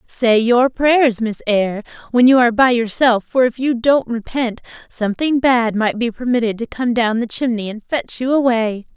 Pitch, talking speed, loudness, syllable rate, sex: 240 Hz, 195 wpm, -16 LUFS, 4.8 syllables/s, female